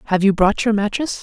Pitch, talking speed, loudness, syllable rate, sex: 210 Hz, 245 wpm, -17 LUFS, 5.9 syllables/s, female